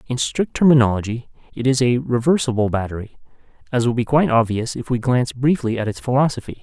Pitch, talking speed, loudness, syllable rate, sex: 125 Hz, 180 wpm, -19 LUFS, 6.3 syllables/s, male